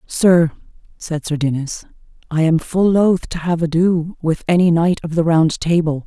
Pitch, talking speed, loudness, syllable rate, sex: 165 Hz, 180 wpm, -17 LUFS, 4.5 syllables/s, female